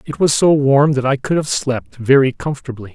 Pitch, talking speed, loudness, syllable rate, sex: 135 Hz, 225 wpm, -15 LUFS, 5.3 syllables/s, male